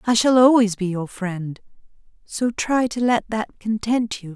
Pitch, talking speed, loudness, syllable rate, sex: 220 Hz, 180 wpm, -20 LUFS, 4.3 syllables/s, female